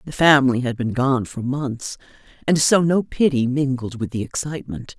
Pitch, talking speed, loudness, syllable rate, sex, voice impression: 135 Hz, 180 wpm, -20 LUFS, 5.0 syllables/s, female, feminine, very adult-like, slightly cool, intellectual, calm